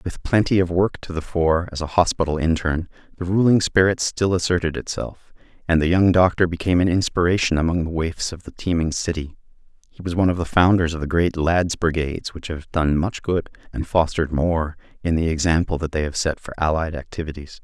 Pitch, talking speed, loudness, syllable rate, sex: 85 Hz, 205 wpm, -21 LUFS, 5.8 syllables/s, male